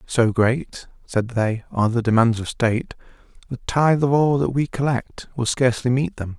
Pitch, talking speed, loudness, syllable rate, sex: 125 Hz, 190 wpm, -20 LUFS, 5.1 syllables/s, male